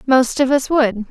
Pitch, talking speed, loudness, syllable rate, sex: 260 Hz, 215 wpm, -16 LUFS, 4.2 syllables/s, female